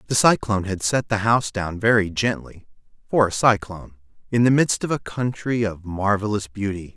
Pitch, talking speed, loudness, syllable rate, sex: 105 Hz, 165 wpm, -21 LUFS, 5.4 syllables/s, male